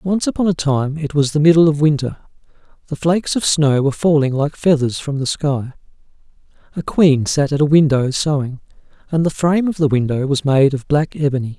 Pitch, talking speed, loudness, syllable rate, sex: 150 Hz, 200 wpm, -16 LUFS, 5.6 syllables/s, male